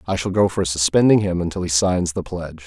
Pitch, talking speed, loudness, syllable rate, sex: 90 Hz, 250 wpm, -19 LUFS, 6.0 syllables/s, male